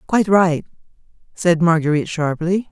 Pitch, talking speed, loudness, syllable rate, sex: 170 Hz, 110 wpm, -17 LUFS, 5.3 syllables/s, female